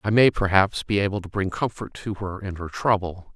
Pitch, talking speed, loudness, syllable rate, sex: 95 Hz, 230 wpm, -24 LUFS, 5.5 syllables/s, male